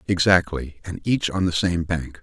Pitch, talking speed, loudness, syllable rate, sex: 85 Hz, 190 wpm, -22 LUFS, 4.5 syllables/s, male